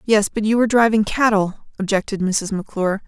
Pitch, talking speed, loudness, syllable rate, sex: 210 Hz, 175 wpm, -19 LUFS, 6.0 syllables/s, female